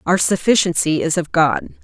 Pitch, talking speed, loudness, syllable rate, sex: 170 Hz, 165 wpm, -17 LUFS, 5.0 syllables/s, female